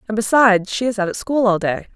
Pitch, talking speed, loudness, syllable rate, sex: 215 Hz, 245 wpm, -17 LUFS, 5.8 syllables/s, female